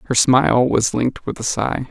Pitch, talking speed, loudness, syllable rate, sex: 120 Hz, 220 wpm, -17 LUFS, 5.3 syllables/s, male